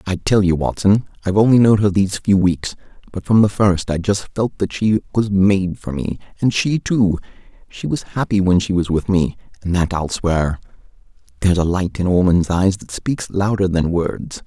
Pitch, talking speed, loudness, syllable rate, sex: 95 Hz, 205 wpm, -18 LUFS, 5.0 syllables/s, male